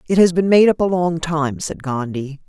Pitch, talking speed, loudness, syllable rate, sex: 165 Hz, 240 wpm, -17 LUFS, 4.9 syllables/s, female